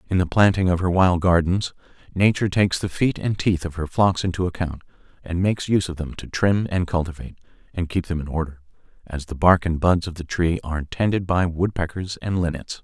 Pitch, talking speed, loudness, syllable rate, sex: 90 Hz, 215 wpm, -22 LUFS, 5.8 syllables/s, male